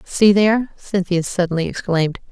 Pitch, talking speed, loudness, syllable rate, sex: 185 Hz, 130 wpm, -18 LUFS, 5.2 syllables/s, female